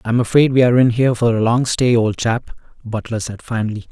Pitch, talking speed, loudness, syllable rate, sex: 115 Hz, 245 wpm, -16 LUFS, 6.4 syllables/s, male